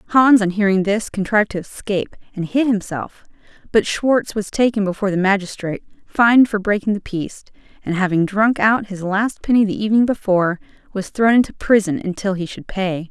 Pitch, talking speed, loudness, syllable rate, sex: 205 Hz, 185 wpm, -18 LUFS, 5.5 syllables/s, female